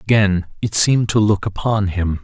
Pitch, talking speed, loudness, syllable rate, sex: 100 Hz, 190 wpm, -17 LUFS, 4.9 syllables/s, male